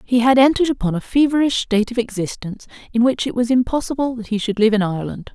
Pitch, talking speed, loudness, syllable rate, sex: 235 Hz, 225 wpm, -18 LUFS, 6.8 syllables/s, female